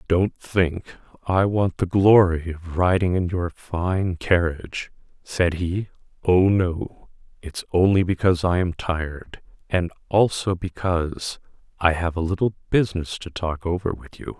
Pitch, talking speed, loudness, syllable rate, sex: 90 Hz, 145 wpm, -22 LUFS, 4.2 syllables/s, male